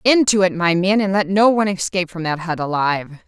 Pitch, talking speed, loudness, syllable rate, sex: 185 Hz, 240 wpm, -18 LUFS, 6.0 syllables/s, female